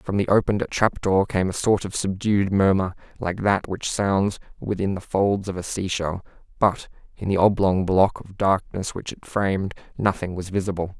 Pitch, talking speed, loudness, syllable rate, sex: 95 Hz, 190 wpm, -23 LUFS, 4.8 syllables/s, male